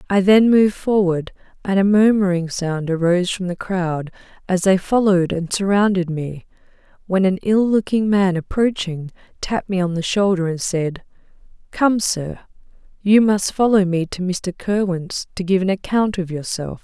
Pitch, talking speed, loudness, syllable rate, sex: 190 Hz, 165 wpm, -18 LUFS, 4.7 syllables/s, female